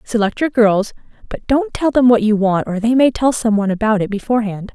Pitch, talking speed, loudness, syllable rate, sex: 225 Hz, 240 wpm, -16 LUFS, 5.8 syllables/s, female